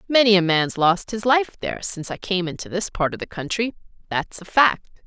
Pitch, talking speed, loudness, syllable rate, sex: 200 Hz, 225 wpm, -21 LUFS, 5.7 syllables/s, female